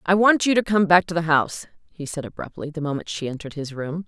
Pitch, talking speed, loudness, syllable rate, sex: 165 Hz, 265 wpm, -22 LUFS, 6.4 syllables/s, female